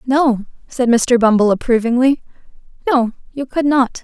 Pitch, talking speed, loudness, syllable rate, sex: 250 Hz, 135 wpm, -16 LUFS, 4.6 syllables/s, female